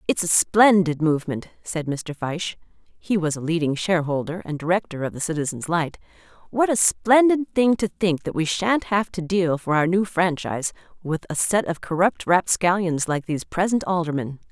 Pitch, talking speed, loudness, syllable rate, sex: 175 Hz, 180 wpm, -22 LUFS, 4.0 syllables/s, female